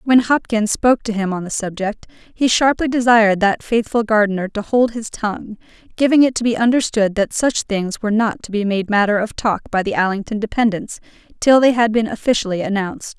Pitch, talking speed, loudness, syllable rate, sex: 220 Hz, 200 wpm, -17 LUFS, 5.7 syllables/s, female